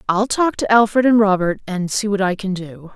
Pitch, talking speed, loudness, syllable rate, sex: 205 Hz, 245 wpm, -17 LUFS, 5.2 syllables/s, female